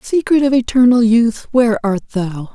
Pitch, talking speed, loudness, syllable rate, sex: 235 Hz, 140 wpm, -14 LUFS, 5.0 syllables/s, female